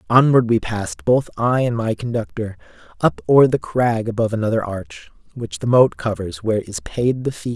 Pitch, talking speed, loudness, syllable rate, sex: 115 Hz, 190 wpm, -19 LUFS, 5.3 syllables/s, male